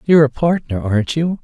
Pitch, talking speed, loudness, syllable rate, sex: 145 Hz, 210 wpm, -16 LUFS, 6.1 syllables/s, male